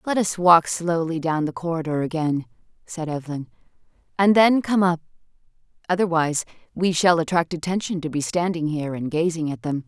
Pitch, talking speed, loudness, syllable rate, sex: 165 Hz, 165 wpm, -22 LUFS, 5.6 syllables/s, female